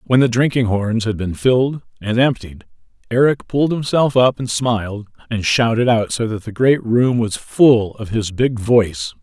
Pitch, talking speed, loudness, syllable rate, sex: 115 Hz, 190 wpm, -17 LUFS, 4.6 syllables/s, male